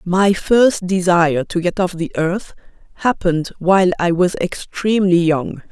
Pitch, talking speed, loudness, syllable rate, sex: 180 Hz, 145 wpm, -17 LUFS, 4.5 syllables/s, female